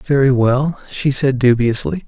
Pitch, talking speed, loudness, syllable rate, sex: 130 Hz, 145 wpm, -15 LUFS, 4.3 syllables/s, male